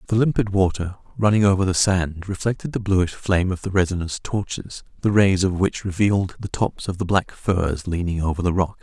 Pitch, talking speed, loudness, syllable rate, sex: 95 Hz, 205 wpm, -21 LUFS, 5.4 syllables/s, male